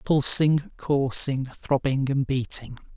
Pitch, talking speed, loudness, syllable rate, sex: 140 Hz, 100 wpm, -22 LUFS, 3.5 syllables/s, male